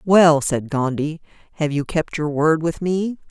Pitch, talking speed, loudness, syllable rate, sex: 160 Hz, 180 wpm, -20 LUFS, 4.0 syllables/s, female